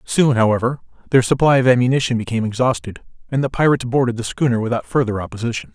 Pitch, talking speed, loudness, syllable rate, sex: 120 Hz, 180 wpm, -18 LUFS, 7.1 syllables/s, male